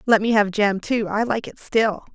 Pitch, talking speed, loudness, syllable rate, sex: 215 Hz, 250 wpm, -21 LUFS, 4.6 syllables/s, female